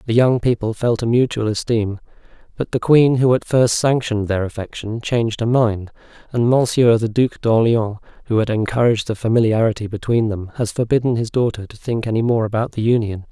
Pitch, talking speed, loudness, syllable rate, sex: 115 Hz, 190 wpm, -18 LUFS, 5.6 syllables/s, male